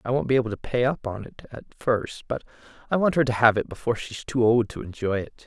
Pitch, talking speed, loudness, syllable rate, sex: 120 Hz, 285 wpm, -24 LUFS, 6.4 syllables/s, male